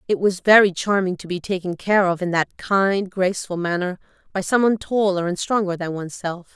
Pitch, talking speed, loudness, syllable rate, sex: 190 Hz, 210 wpm, -20 LUFS, 5.6 syllables/s, female